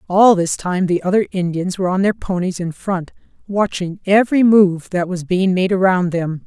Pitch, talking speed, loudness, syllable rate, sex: 185 Hz, 195 wpm, -17 LUFS, 5.0 syllables/s, female